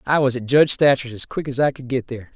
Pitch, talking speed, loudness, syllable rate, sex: 130 Hz, 305 wpm, -19 LUFS, 6.7 syllables/s, male